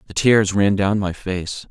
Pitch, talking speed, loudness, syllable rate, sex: 100 Hz, 210 wpm, -19 LUFS, 4.0 syllables/s, male